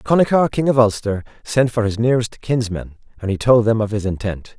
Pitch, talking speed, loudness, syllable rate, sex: 115 Hz, 210 wpm, -18 LUFS, 5.6 syllables/s, male